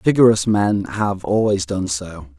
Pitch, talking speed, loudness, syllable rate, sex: 95 Hz, 150 wpm, -18 LUFS, 4.0 syllables/s, male